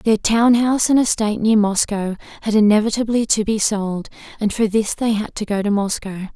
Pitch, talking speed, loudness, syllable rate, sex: 215 Hz, 200 wpm, -18 LUFS, 5.4 syllables/s, female